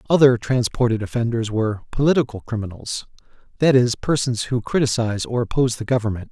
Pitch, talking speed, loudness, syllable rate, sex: 120 Hz, 145 wpm, -20 LUFS, 6.2 syllables/s, male